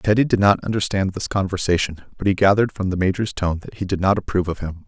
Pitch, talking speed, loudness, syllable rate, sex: 95 Hz, 245 wpm, -20 LUFS, 6.6 syllables/s, male